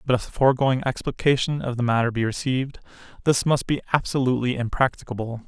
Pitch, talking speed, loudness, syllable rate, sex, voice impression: 125 Hz, 165 wpm, -23 LUFS, 6.6 syllables/s, male, masculine, adult-like, slightly cool, friendly, reassuring, slightly kind